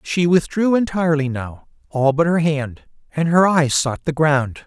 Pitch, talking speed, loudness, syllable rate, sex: 155 Hz, 180 wpm, -18 LUFS, 4.5 syllables/s, male